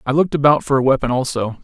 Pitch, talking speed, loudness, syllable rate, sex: 135 Hz, 260 wpm, -16 LUFS, 7.5 syllables/s, male